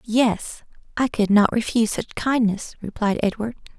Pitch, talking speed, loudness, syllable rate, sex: 220 Hz, 145 wpm, -22 LUFS, 4.6 syllables/s, female